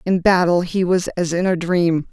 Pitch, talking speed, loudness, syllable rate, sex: 175 Hz, 225 wpm, -18 LUFS, 4.7 syllables/s, female